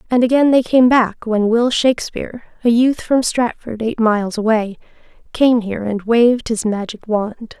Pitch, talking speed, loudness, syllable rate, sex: 230 Hz, 175 wpm, -16 LUFS, 4.9 syllables/s, female